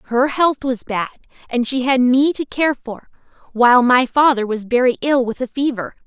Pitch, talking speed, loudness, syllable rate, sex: 255 Hz, 200 wpm, -17 LUFS, 4.8 syllables/s, female